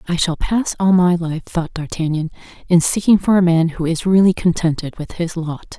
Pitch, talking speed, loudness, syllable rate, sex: 170 Hz, 205 wpm, -17 LUFS, 5.0 syllables/s, female